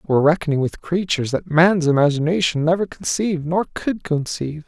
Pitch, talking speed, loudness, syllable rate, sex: 160 Hz, 140 wpm, -19 LUFS, 5.6 syllables/s, male